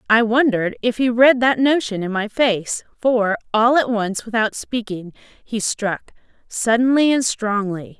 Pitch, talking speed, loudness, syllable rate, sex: 225 Hz, 160 wpm, -18 LUFS, 4.2 syllables/s, female